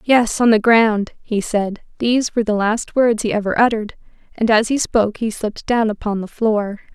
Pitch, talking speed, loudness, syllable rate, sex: 220 Hz, 190 wpm, -18 LUFS, 5.3 syllables/s, female